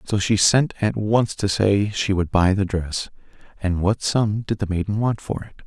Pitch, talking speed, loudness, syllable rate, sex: 100 Hz, 220 wpm, -21 LUFS, 4.5 syllables/s, male